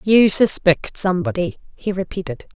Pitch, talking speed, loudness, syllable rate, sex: 185 Hz, 115 wpm, -18 LUFS, 5.0 syllables/s, female